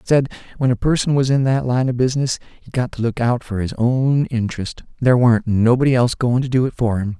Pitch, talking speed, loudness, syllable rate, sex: 125 Hz, 240 wpm, -18 LUFS, 5.7 syllables/s, male